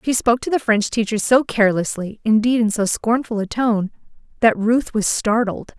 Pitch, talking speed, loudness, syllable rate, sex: 220 Hz, 165 wpm, -18 LUFS, 5.1 syllables/s, female